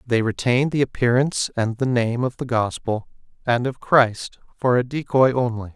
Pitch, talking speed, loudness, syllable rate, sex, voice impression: 125 Hz, 175 wpm, -21 LUFS, 4.8 syllables/s, male, very masculine, very adult-like, middle-aged, very thick, tensed, powerful, bright, slightly soft, clear, slightly fluent, cool, very intellectual, slightly refreshing, sincere, very calm, slightly mature, friendly, reassuring, elegant, slightly sweet, slightly lively, kind, slightly modest